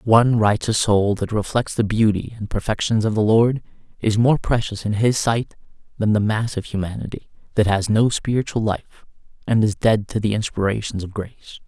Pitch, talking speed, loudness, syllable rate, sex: 110 Hz, 185 wpm, -20 LUFS, 5.5 syllables/s, male